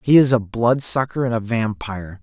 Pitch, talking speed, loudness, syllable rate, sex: 115 Hz, 190 wpm, -19 LUFS, 5.2 syllables/s, male